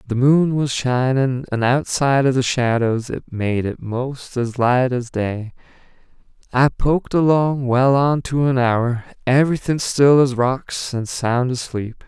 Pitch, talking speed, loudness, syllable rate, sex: 130 Hz, 160 wpm, -18 LUFS, 4.0 syllables/s, male